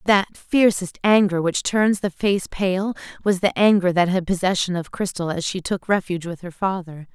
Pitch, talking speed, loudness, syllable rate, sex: 185 Hz, 195 wpm, -21 LUFS, 4.9 syllables/s, female